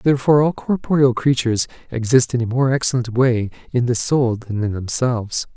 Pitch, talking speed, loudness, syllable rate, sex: 125 Hz, 175 wpm, -18 LUFS, 5.6 syllables/s, male